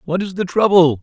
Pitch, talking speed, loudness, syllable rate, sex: 180 Hz, 235 wpm, -16 LUFS, 5.5 syllables/s, male